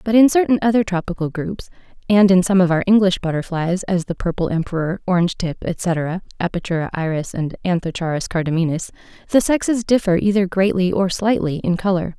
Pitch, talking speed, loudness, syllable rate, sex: 185 Hz, 165 wpm, -19 LUFS, 4.6 syllables/s, female